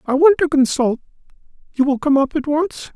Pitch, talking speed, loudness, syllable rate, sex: 285 Hz, 185 wpm, -17 LUFS, 5.3 syllables/s, male